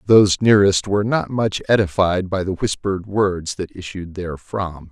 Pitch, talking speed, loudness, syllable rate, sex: 95 Hz, 160 wpm, -19 LUFS, 5.1 syllables/s, male